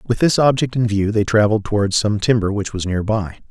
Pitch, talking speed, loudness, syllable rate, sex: 110 Hz, 240 wpm, -18 LUFS, 5.6 syllables/s, male